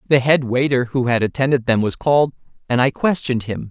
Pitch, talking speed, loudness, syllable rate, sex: 130 Hz, 210 wpm, -18 LUFS, 6.0 syllables/s, male